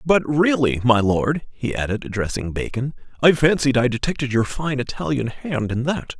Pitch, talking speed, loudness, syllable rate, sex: 130 Hz, 175 wpm, -21 LUFS, 4.9 syllables/s, male